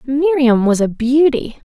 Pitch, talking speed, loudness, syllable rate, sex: 260 Hz, 140 wpm, -14 LUFS, 3.9 syllables/s, female